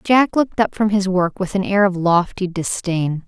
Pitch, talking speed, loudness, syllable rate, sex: 190 Hz, 220 wpm, -18 LUFS, 4.7 syllables/s, female